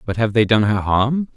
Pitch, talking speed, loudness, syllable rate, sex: 115 Hz, 265 wpm, -17 LUFS, 5.0 syllables/s, male